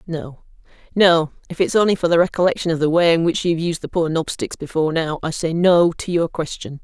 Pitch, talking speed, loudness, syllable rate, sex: 165 Hz, 230 wpm, -19 LUFS, 5.9 syllables/s, female